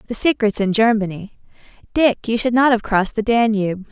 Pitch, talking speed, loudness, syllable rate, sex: 220 Hz, 185 wpm, -18 LUFS, 5.7 syllables/s, female